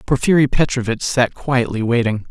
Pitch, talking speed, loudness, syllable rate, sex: 125 Hz, 130 wpm, -17 LUFS, 5.1 syllables/s, male